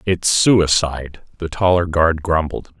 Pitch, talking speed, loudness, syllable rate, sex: 85 Hz, 130 wpm, -16 LUFS, 4.0 syllables/s, male